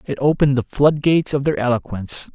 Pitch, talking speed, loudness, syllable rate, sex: 140 Hz, 180 wpm, -18 LUFS, 6.4 syllables/s, male